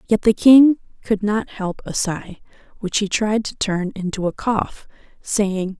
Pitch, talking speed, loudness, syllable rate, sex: 205 Hz, 175 wpm, -19 LUFS, 3.9 syllables/s, female